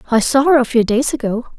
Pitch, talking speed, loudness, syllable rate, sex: 250 Hz, 265 wpm, -15 LUFS, 6.4 syllables/s, female